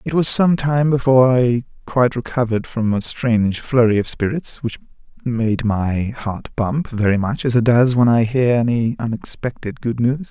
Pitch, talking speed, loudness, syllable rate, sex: 120 Hz, 180 wpm, -18 LUFS, 4.7 syllables/s, male